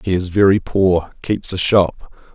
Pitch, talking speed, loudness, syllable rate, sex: 95 Hz, 180 wpm, -16 LUFS, 4.0 syllables/s, male